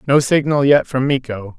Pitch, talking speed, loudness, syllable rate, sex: 135 Hz, 190 wpm, -16 LUFS, 4.9 syllables/s, male